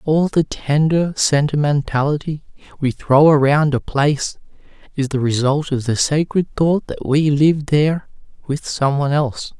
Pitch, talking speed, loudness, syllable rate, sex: 145 Hz, 150 wpm, -17 LUFS, 4.6 syllables/s, male